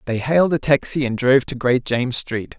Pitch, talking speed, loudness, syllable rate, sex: 130 Hz, 230 wpm, -19 LUFS, 5.8 syllables/s, male